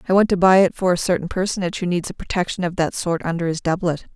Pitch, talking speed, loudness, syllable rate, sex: 180 Hz, 275 wpm, -20 LUFS, 6.9 syllables/s, female